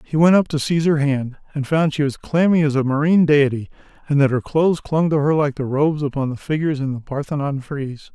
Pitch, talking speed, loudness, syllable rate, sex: 145 Hz, 245 wpm, -19 LUFS, 6.2 syllables/s, male